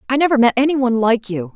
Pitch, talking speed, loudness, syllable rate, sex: 250 Hz, 270 wpm, -16 LUFS, 7.5 syllables/s, female